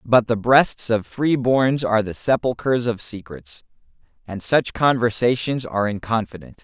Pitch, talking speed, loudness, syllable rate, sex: 115 Hz, 155 wpm, -20 LUFS, 4.8 syllables/s, male